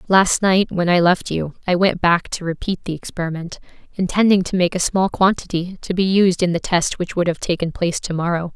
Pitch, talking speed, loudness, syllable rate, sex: 180 Hz, 225 wpm, -19 LUFS, 5.4 syllables/s, female